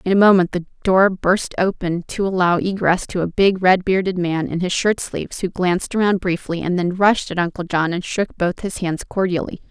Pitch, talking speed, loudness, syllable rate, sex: 180 Hz, 215 wpm, -19 LUFS, 5.2 syllables/s, female